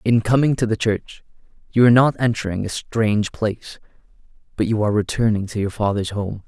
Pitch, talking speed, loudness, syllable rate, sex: 110 Hz, 185 wpm, -20 LUFS, 5.9 syllables/s, male